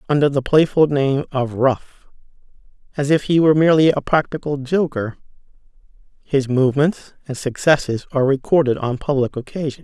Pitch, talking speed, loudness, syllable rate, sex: 140 Hz, 140 wpm, -18 LUFS, 4.0 syllables/s, male